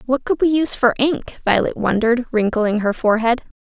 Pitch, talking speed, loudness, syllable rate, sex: 240 Hz, 180 wpm, -18 LUFS, 5.6 syllables/s, female